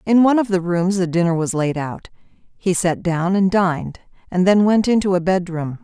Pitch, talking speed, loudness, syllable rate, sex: 185 Hz, 215 wpm, -18 LUFS, 4.8 syllables/s, female